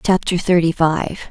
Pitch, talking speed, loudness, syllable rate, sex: 170 Hz, 140 wpm, -17 LUFS, 4.1 syllables/s, female